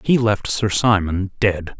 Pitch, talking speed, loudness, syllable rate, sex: 105 Hz, 165 wpm, -19 LUFS, 3.8 syllables/s, male